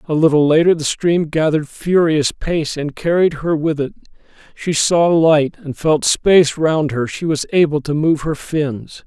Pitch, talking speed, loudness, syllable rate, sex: 155 Hz, 185 wpm, -16 LUFS, 4.4 syllables/s, male